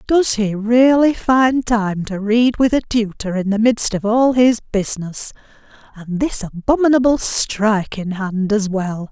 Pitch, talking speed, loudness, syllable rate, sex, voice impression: 220 Hz, 160 wpm, -17 LUFS, 4.2 syllables/s, female, feminine, adult-like, slightly powerful, soft, slightly muffled, slightly raspy, friendly, unique, lively, slightly kind, slightly intense